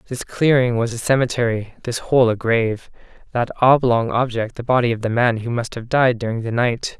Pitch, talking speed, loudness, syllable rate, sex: 120 Hz, 205 wpm, -19 LUFS, 5.3 syllables/s, male